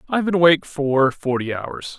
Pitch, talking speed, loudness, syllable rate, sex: 150 Hz, 210 wpm, -19 LUFS, 5.5 syllables/s, male